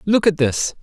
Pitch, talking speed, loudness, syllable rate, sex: 170 Hz, 215 wpm, -18 LUFS, 4.5 syllables/s, male